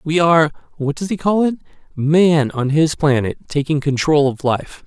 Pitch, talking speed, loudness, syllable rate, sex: 155 Hz, 160 wpm, -17 LUFS, 4.8 syllables/s, male